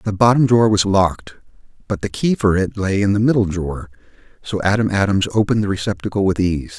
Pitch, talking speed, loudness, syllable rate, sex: 100 Hz, 205 wpm, -17 LUFS, 6.3 syllables/s, male